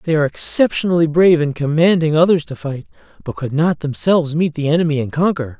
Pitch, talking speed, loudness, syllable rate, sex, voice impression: 155 Hz, 195 wpm, -16 LUFS, 6.3 syllables/s, male, masculine, adult-like, cool, sincere, slightly sweet